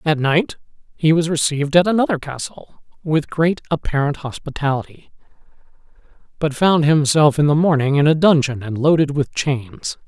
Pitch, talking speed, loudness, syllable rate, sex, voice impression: 150 Hz, 150 wpm, -18 LUFS, 5.0 syllables/s, male, masculine, adult-like, slightly middle-aged, slightly thick, slightly relaxed, slightly weak, slightly bright, slightly soft, slightly muffled, slightly fluent, slightly cool, intellectual, slightly refreshing, sincere, very calm, slightly mature, friendly, reassuring, slightly unique, elegant, sweet, very kind, very modest, slightly light